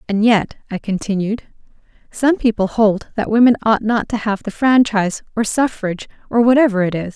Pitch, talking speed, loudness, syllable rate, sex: 215 Hz, 175 wpm, -17 LUFS, 5.3 syllables/s, female